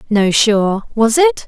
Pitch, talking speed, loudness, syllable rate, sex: 220 Hz, 165 wpm, -13 LUFS, 3.4 syllables/s, female